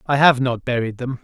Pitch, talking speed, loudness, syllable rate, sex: 125 Hz, 245 wpm, -19 LUFS, 5.4 syllables/s, male